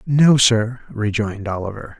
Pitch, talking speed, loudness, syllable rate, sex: 115 Hz, 120 wpm, -18 LUFS, 4.5 syllables/s, male